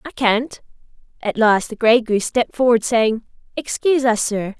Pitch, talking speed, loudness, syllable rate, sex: 230 Hz, 170 wpm, -18 LUFS, 5.0 syllables/s, female